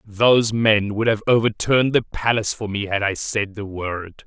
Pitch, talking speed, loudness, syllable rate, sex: 105 Hz, 195 wpm, -20 LUFS, 4.8 syllables/s, male